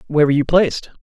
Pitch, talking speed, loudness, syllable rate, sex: 150 Hz, 235 wpm, -16 LUFS, 8.9 syllables/s, male